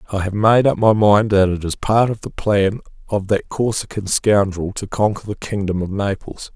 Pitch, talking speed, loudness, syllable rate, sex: 100 Hz, 210 wpm, -18 LUFS, 4.9 syllables/s, male